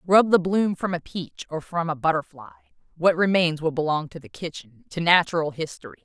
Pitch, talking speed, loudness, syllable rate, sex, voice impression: 165 Hz, 190 wpm, -23 LUFS, 5.4 syllables/s, female, feminine, adult-like, slightly cool, intellectual, slightly calm, slightly strict